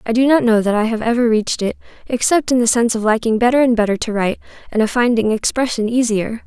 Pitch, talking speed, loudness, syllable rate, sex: 230 Hz, 240 wpm, -16 LUFS, 6.6 syllables/s, female